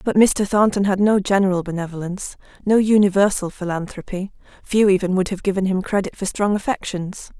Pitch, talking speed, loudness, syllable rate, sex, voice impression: 195 Hz, 155 wpm, -19 LUFS, 5.8 syllables/s, female, very feminine, slightly young, slightly adult-like, slightly thin, tensed, slightly weak, slightly dark, very hard, clear, fluent, slightly cute, cool, intellectual, slightly refreshing, sincere, very calm, friendly, reassuring, slightly unique, elegant, slightly wild, slightly sweet, slightly lively, strict, slightly intense, slightly sharp